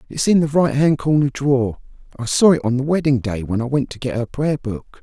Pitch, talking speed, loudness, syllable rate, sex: 135 Hz, 250 wpm, -18 LUFS, 5.6 syllables/s, male